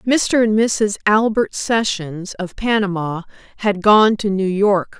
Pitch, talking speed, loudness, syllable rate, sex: 205 Hz, 145 wpm, -17 LUFS, 3.6 syllables/s, female